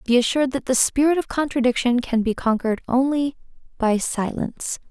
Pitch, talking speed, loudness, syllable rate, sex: 250 Hz, 160 wpm, -21 LUFS, 5.7 syllables/s, female